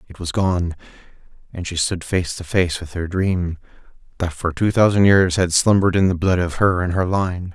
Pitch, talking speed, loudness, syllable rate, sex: 90 Hz, 215 wpm, -19 LUFS, 5.0 syllables/s, male